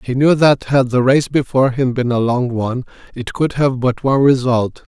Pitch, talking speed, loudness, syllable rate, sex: 130 Hz, 220 wpm, -15 LUFS, 5.2 syllables/s, male